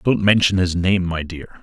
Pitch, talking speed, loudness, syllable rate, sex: 90 Hz, 220 wpm, -18 LUFS, 4.6 syllables/s, male